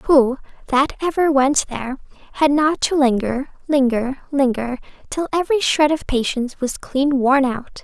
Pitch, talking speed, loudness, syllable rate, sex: 275 Hz, 155 wpm, -19 LUFS, 4.6 syllables/s, female